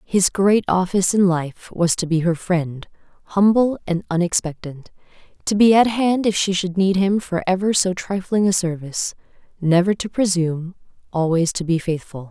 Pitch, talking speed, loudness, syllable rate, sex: 185 Hz, 170 wpm, -19 LUFS, 4.9 syllables/s, female